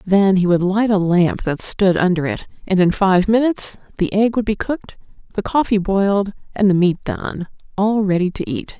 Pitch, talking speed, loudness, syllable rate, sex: 195 Hz, 200 wpm, -18 LUFS, 5.0 syllables/s, female